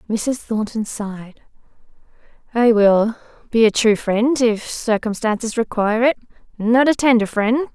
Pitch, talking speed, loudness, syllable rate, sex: 225 Hz, 130 wpm, -18 LUFS, 4.4 syllables/s, female